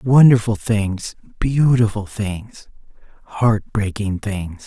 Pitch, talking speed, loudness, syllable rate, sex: 110 Hz, 90 wpm, -18 LUFS, 3.2 syllables/s, male